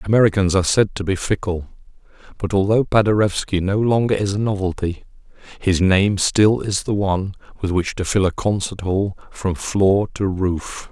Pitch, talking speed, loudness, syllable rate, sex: 100 Hz, 170 wpm, -19 LUFS, 4.9 syllables/s, male